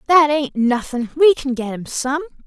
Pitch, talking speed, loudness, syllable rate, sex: 275 Hz, 195 wpm, -18 LUFS, 4.6 syllables/s, female